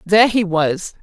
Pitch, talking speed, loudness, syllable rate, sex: 190 Hz, 175 wpm, -16 LUFS, 4.6 syllables/s, female